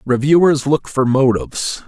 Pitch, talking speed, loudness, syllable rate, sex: 135 Hz, 130 wpm, -15 LUFS, 4.6 syllables/s, male